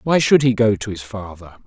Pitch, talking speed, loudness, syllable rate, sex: 110 Hz, 255 wpm, -17 LUFS, 5.5 syllables/s, male